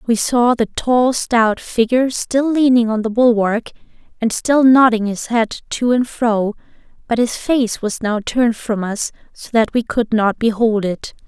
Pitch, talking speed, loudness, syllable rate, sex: 230 Hz, 180 wpm, -16 LUFS, 4.2 syllables/s, female